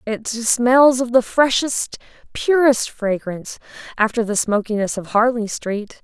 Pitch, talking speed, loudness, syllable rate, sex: 230 Hz, 130 wpm, -18 LUFS, 4.1 syllables/s, female